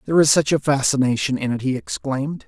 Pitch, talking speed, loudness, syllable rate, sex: 135 Hz, 220 wpm, -20 LUFS, 6.4 syllables/s, male